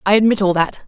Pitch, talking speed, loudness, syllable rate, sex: 200 Hz, 275 wpm, -16 LUFS, 6.9 syllables/s, female